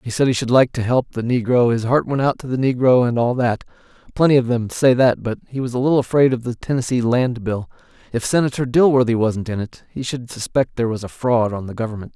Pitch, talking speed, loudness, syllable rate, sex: 120 Hz, 245 wpm, -19 LUFS, 6.0 syllables/s, male